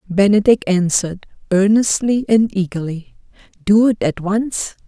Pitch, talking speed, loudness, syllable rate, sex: 200 Hz, 110 wpm, -16 LUFS, 4.6 syllables/s, female